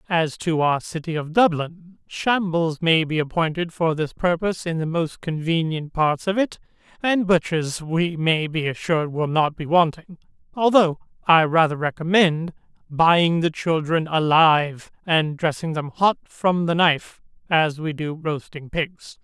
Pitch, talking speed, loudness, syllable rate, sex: 165 Hz, 155 wpm, -21 LUFS, 4.3 syllables/s, male